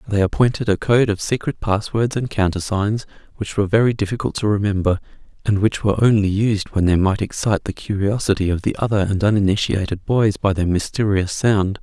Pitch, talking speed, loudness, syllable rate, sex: 105 Hz, 185 wpm, -19 LUFS, 5.7 syllables/s, male